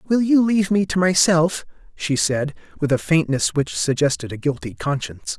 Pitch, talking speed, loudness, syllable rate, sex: 160 Hz, 180 wpm, -20 LUFS, 5.2 syllables/s, male